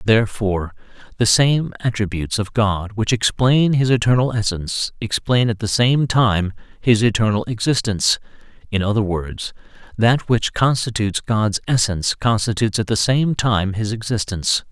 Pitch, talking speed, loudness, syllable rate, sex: 110 Hz, 135 wpm, -18 LUFS, 5.0 syllables/s, male